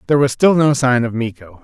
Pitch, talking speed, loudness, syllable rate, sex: 130 Hz, 255 wpm, -15 LUFS, 6.2 syllables/s, male